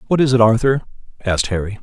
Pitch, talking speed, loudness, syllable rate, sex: 115 Hz, 200 wpm, -17 LUFS, 7.1 syllables/s, male